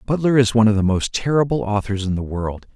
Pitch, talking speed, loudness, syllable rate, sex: 110 Hz, 240 wpm, -19 LUFS, 6.3 syllables/s, male